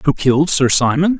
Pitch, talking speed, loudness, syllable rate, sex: 150 Hz, 200 wpm, -14 LUFS, 5.6 syllables/s, male